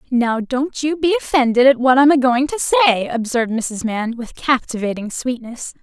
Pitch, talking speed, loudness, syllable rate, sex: 250 Hz, 185 wpm, -17 LUFS, 5.1 syllables/s, female